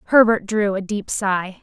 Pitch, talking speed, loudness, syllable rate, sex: 205 Hz, 185 wpm, -19 LUFS, 4.3 syllables/s, female